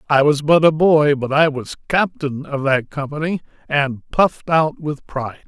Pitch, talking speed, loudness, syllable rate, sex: 150 Hz, 185 wpm, -18 LUFS, 4.6 syllables/s, male